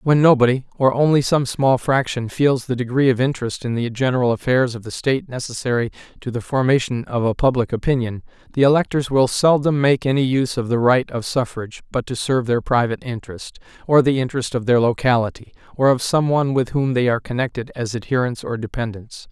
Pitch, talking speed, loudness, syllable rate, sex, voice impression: 125 Hz, 200 wpm, -19 LUFS, 6.0 syllables/s, male, masculine, adult-like, slightly fluent, cool, refreshing, sincere, friendly